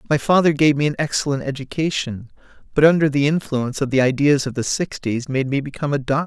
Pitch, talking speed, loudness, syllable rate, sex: 140 Hz, 210 wpm, -19 LUFS, 6.4 syllables/s, male